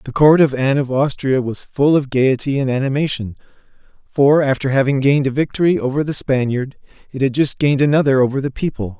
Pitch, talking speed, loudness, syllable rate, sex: 135 Hz, 195 wpm, -16 LUFS, 6.0 syllables/s, male